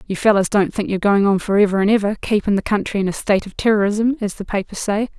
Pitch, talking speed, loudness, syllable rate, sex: 205 Hz, 265 wpm, -18 LUFS, 6.7 syllables/s, female